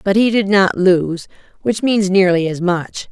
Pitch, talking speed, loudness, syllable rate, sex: 190 Hz, 195 wpm, -15 LUFS, 4.2 syllables/s, female